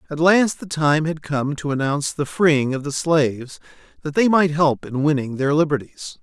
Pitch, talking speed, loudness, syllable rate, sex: 150 Hz, 205 wpm, -20 LUFS, 4.8 syllables/s, male